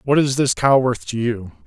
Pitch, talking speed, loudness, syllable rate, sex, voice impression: 125 Hz, 250 wpm, -18 LUFS, 4.9 syllables/s, male, masculine, adult-like, tensed, slightly bright, clear, intellectual, calm, friendly, slightly wild, lively, kind